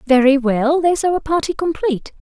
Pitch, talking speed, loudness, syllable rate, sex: 295 Hz, 185 wpm, -17 LUFS, 5.8 syllables/s, female